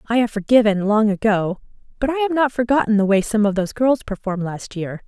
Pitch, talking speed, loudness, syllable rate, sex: 220 Hz, 225 wpm, -19 LUFS, 6.0 syllables/s, female